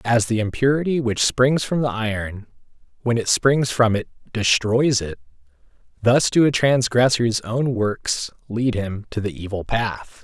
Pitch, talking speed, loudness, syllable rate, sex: 115 Hz, 160 wpm, -20 LUFS, 4.2 syllables/s, male